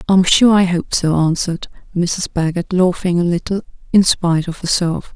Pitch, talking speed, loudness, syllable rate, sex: 175 Hz, 175 wpm, -16 LUFS, 5.1 syllables/s, female